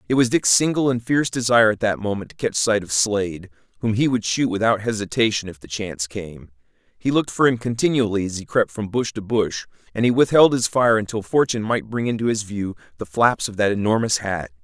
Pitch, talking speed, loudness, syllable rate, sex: 110 Hz, 225 wpm, -20 LUFS, 5.9 syllables/s, male